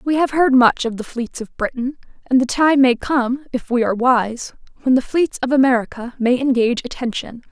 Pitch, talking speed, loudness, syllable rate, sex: 255 Hz, 210 wpm, -18 LUFS, 5.2 syllables/s, female